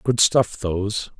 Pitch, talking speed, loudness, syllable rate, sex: 105 Hz, 150 wpm, -20 LUFS, 3.8 syllables/s, male